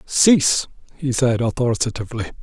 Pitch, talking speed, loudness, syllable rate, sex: 125 Hz, 100 wpm, -19 LUFS, 6.0 syllables/s, male